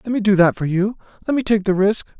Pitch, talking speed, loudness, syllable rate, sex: 205 Hz, 275 wpm, -18 LUFS, 6.5 syllables/s, male